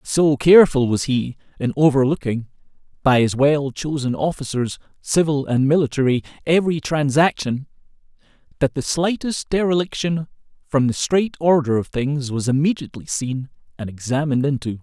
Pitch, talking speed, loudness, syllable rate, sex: 140 Hz, 130 wpm, -19 LUFS, 5.1 syllables/s, male